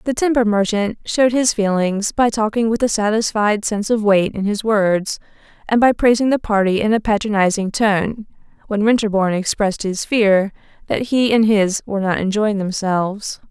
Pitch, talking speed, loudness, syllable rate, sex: 210 Hz, 175 wpm, -17 LUFS, 5.1 syllables/s, female